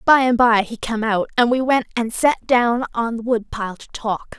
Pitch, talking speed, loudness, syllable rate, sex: 235 Hz, 235 wpm, -19 LUFS, 4.8 syllables/s, female